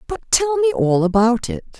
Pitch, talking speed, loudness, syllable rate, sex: 245 Hz, 200 wpm, -17 LUFS, 4.9 syllables/s, female